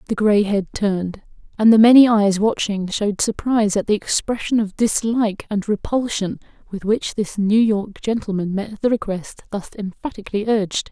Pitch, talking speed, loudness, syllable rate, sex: 210 Hz, 165 wpm, -19 LUFS, 5.1 syllables/s, female